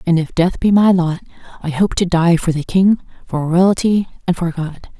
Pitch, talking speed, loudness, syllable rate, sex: 175 Hz, 215 wpm, -16 LUFS, 4.8 syllables/s, female